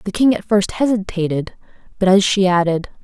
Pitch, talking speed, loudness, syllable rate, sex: 195 Hz, 180 wpm, -17 LUFS, 5.4 syllables/s, female